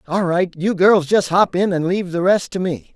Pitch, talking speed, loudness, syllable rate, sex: 180 Hz, 265 wpm, -17 LUFS, 5.1 syllables/s, male